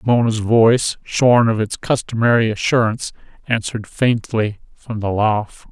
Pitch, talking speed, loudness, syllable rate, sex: 115 Hz, 135 wpm, -17 LUFS, 4.7 syllables/s, male